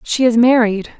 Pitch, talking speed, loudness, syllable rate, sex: 235 Hz, 180 wpm, -13 LUFS, 4.9 syllables/s, female